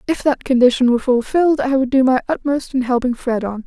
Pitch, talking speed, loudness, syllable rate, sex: 260 Hz, 230 wpm, -17 LUFS, 6.1 syllables/s, female